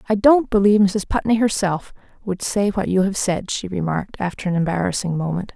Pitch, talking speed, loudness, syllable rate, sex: 195 Hz, 195 wpm, -20 LUFS, 5.8 syllables/s, female